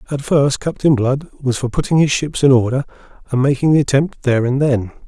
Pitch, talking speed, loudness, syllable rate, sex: 135 Hz, 215 wpm, -16 LUFS, 5.7 syllables/s, male